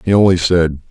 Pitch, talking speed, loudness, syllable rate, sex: 85 Hz, 200 wpm, -13 LUFS, 5.5 syllables/s, male